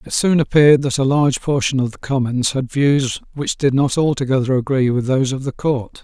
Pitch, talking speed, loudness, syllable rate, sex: 135 Hz, 220 wpm, -17 LUFS, 5.6 syllables/s, male